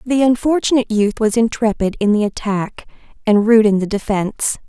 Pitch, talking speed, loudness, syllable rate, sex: 220 Hz, 165 wpm, -16 LUFS, 5.4 syllables/s, female